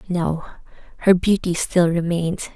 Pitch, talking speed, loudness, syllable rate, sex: 175 Hz, 120 wpm, -20 LUFS, 4.9 syllables/s, female